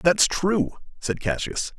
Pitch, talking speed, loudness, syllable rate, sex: 160 Hz, 135 wpm, -24 LUFS, 3.4 syllables/s, male